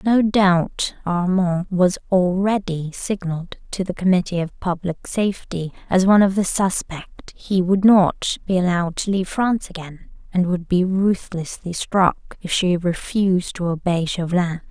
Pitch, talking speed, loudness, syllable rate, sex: 180 Hz, 150 wpm, -20 LUFS, 4.5 syllables/s, female